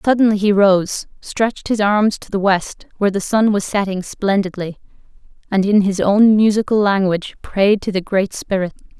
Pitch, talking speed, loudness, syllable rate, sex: 200 Hz, 175 wpm, -17 LUFS, 5.0 syllables/s, female